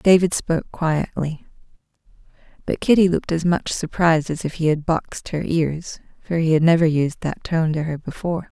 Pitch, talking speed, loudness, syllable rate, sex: 160 Hz, 180 wpm, -21 LUFS, 5.2 syllables/s, female